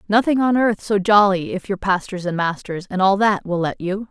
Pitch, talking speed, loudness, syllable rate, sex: 195 Hz, 235 wpm, -19 LUFS, 5.1 syllables/s, female